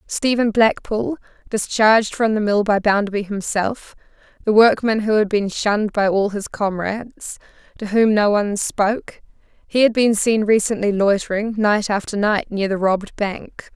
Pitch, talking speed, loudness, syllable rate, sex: 210 Hz, 155 wpm, -18 LUFS, 4.7 syllables/s, female